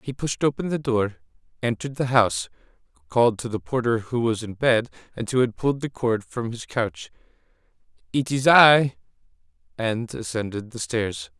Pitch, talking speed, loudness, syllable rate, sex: 120 Hz, 170 wpm, -23 LUFS, 5.1 syllables/s, male